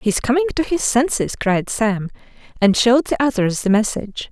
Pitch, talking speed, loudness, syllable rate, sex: 240 Hz, 180 wpm, -18 LUFS, 5.2 syllables/s, female